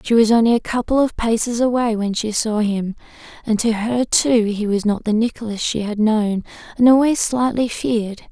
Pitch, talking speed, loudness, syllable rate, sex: 225 Hz, 200 wpm, -18 LUFS, 5.1 syllables/s, female